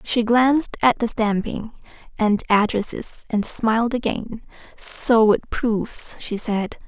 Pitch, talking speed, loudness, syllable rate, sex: 225 Hz, 130 wpm, -21 LUFS, 3.8 syllables/s, female